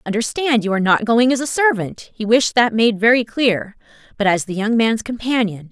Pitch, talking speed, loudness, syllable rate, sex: 225 Hz, 190 wpm, -17 LUFS, 5.2 syllables/s, female